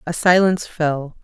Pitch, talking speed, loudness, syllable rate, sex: 165 Hz, 145 wpm, -18 LUFS, 4.6 syllables/s, female